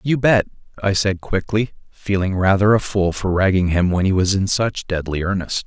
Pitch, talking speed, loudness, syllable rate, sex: 95 Hz, 200 wpm, -19 LUFS, 5.0 syllables/s, male